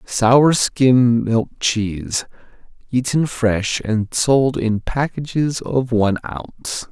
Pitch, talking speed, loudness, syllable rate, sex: 120 Hz, 115 wpm, -18 LUFS, 3.2 syllables/s, male